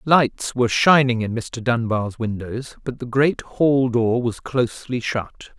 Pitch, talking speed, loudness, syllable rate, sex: 120 Hz, 160 wpm, -20 LUFS, 3.9 syllables/s, male